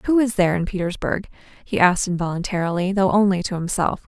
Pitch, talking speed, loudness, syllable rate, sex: 190 Hz, 175 wpm, -21 LUFS, 6.5 syllables/s, female